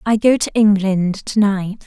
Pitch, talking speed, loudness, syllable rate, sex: 205 Hz, 195 wpm, -16 LUFS, 4.1 syllables/s, female